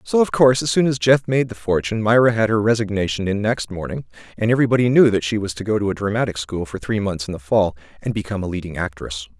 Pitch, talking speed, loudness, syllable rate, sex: 105 Hz, 255 wpm, -19 LUFS, 6.7 syllables/s, male